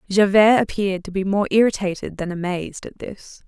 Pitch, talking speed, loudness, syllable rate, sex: 195 Hz, 170 wpm, -19 LUFS, 5.6 syllables/s, female